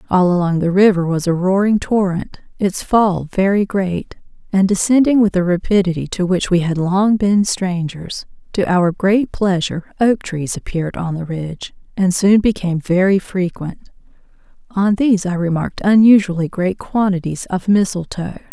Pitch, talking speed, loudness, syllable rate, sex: 190 Hz, 155 wpm, -16 LUFS, 4.8 syllables/s, female